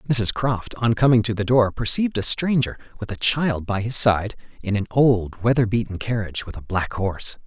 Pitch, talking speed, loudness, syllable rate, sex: 110 Hz, 210 wpm, -21 LUFS, 5.1 syllables/s, male